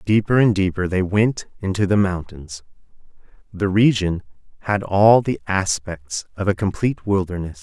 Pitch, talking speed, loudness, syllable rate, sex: 95 Hz, 140 wpm, -20 LUFS, 4.7 syllables/s, male